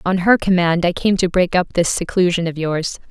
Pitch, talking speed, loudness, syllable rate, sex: 175 Hz, 230 wpm, -17 LUFS, 5.1 syllables/s, female